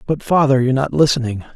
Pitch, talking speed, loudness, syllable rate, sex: 135 Hz, 195 wpm, -16 LUFS, 6.7 syllables/s, male